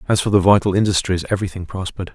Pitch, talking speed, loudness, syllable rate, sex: 95 Hz, 195 wpm, -18 LUFS, 7.6 syllables/s, male